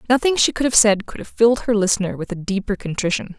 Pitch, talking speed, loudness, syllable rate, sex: 210 Hz, 250 wpm, -18 LUFS, 6.5 syllables/s, female